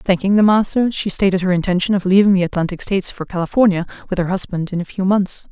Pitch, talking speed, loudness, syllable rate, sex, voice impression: 190 Hz, 230 wpm, -17 LUFS, 6.5 syllables/s, female, feminine, adult-like, fluent, slightly sincere, calm